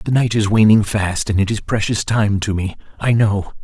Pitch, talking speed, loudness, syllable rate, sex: 105 Hz, 230 wpm, -17 LUFS, 4.9 syllables/s, male